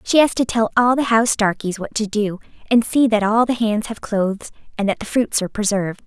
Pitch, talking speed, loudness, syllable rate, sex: 220 Hz, 245 wpm, -19 LUFS, 5.8 syllables/s, female